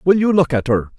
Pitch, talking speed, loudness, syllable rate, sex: 155 Hz, 305 wpm, -16 LUFS, 5.9 syllables/s, male